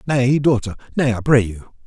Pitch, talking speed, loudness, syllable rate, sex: 120 Hz, 195 wpm, -18 LUFS, 5.2 syllables/s, male